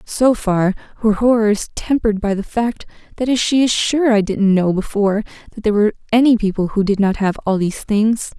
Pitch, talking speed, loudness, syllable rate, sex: 215 Hz, 205 wpm, -17 LUFS, 5.6 syllables/s, female